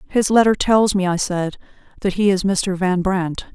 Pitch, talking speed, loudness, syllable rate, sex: 190 Hz, 205 wpm, -18 LUFS, 4.5 syllables/s, female